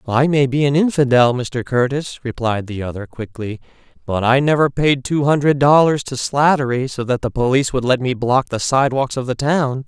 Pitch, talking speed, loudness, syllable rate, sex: 130 Hz, 200 wpm, -17 LUFS, 5.2 syllables/s, male